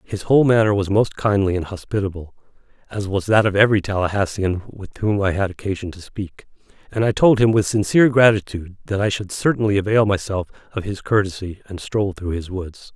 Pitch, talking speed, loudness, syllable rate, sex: 100 Hz, 185 wpm, -19 LUFS, 5.9 syllables/s, male